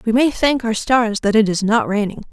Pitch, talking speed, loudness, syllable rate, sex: 225 Hz, 260 wpm, -17 LUFS, 5.1 syllables/s, female